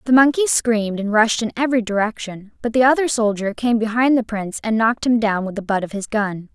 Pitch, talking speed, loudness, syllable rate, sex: 225 Hz, 240 wpm, -19 LUFS, 5.9 syllables/s, female